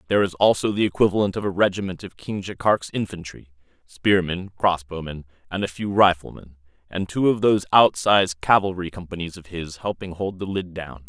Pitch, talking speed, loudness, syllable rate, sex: 90 Hz, 160 wpm, -22 LUFS, 5.6 syllables/s, male